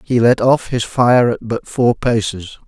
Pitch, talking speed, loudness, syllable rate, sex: 115 Hz, 200 wpm, -15 LUFS, 4.1 syllables/s, male